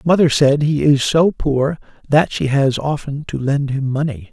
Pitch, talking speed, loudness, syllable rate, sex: 145 Hz, 195 wpm, -17 LUFS, 4.4 syllables/s, male